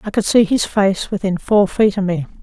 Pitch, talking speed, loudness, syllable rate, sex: 195 Hz, 250 wpm, -16 LUFS, 5.1 syllables/s, female